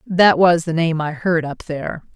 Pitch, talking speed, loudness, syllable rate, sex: 165 Hz, 225 wpm, -17 LUFS, 4.6 syllables/s, female